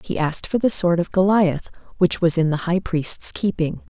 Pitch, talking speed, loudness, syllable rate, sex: 175 Hz, 215 wpm, -19 LUFS, 4.9 syllables/s, female